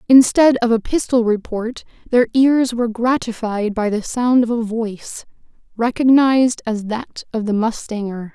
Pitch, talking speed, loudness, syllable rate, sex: 230 Hz, 150 wpm, -17 LUFS, 4.6 syllables/s, female